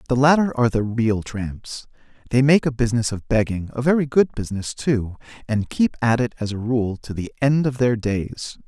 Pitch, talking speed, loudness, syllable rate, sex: 120 Hz, 195 wpm, -21 LUFS, 5.2 syllables/s, male